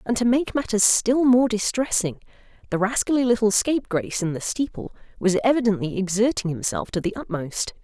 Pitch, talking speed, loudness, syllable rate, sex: 220 Hz, 170 wpm, -22 LUFS, 5.6 syllables/s, female